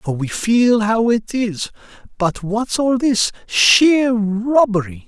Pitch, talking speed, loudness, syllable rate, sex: 220 Hz, 130 wpm, -16 LUFS, 3.2 syllables/s, male